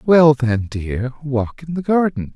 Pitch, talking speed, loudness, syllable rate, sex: 135 Hz, 180 wpm, -18 LUFS, 3.7 syllables/s, male